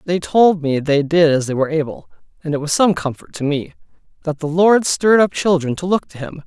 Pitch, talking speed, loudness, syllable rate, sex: 160 Hz, 240 wpm, -17 LUFS, 5.7 syllables/s, male